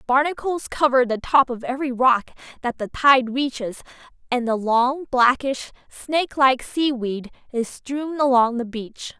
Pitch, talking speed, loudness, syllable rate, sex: 255 Hz, 145 wpm, -21 LUFS, 4.4 syllables/s, female